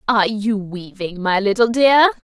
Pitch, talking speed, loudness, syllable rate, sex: 215 Hz, 155 wpm, -17 LUFS, 4.6 syllables/s, female